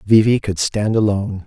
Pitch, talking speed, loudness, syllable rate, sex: 100 Hz, 205 wpm, -17 LUFS, 5.1 syllables/s, male